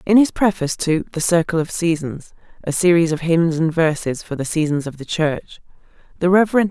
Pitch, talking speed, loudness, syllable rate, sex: 165 Hz, 195 wpm, -18 LUFS, 5.3 syllables/s, female